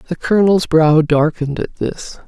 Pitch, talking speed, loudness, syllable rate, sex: 160 Hz, 160 wpm, -15 LUFS, 5.0 syllables/s, female